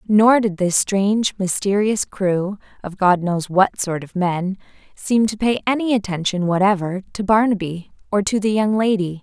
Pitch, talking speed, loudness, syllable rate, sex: 195 Hz, 170 wpm, -19 LUFS, 4.5 syllables/s, female